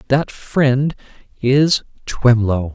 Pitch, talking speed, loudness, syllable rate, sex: 130 Hz, 90 wpm, -17 LUFS, 2.7 syllables/s, male